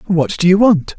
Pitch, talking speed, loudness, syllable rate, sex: 180 Hz, 245 wpm, -13 LUFS, 4.9 syllables/s, male